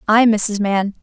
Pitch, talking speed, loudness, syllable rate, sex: 210 Hz, 175 wpm, -16 LUFS, 3.7 syllables/s, female